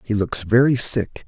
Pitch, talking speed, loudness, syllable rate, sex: 110 Hz, 190 wpm, -18 LUFS, 4.9 syllables/s, male